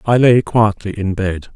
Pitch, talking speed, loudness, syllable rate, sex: 105 Hz, 195 wpm, -15 LUFS, 4.3 syllables/s, male